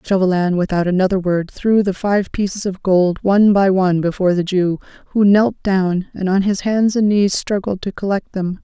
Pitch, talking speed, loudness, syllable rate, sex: 190 Hz, 200 wpm, -17 LUFS, 5.1 syllables/s, female